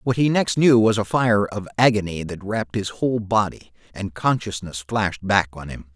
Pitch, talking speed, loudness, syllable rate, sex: 105 Hz, 200 wpm, -21 LUFS, 5.2 syllables/s, male